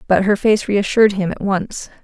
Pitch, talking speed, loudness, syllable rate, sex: 200 Hz, 205 wpm, -16 LUFS, 5.1 syllables/s, female